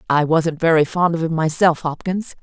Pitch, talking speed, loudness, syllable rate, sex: 165 Hz, 200 wpm, -18 LUFS, 5.0 syllables/s, female